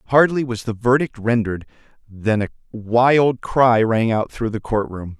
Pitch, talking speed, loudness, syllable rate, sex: 115 Hz, 160 wpm, -19 LUFS, 4.4 syllables/s, male